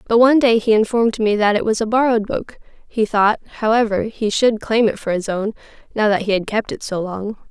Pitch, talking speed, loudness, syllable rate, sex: 220 Hz, 240 wpm, -18 LUFS, 5.9 syllables/s, female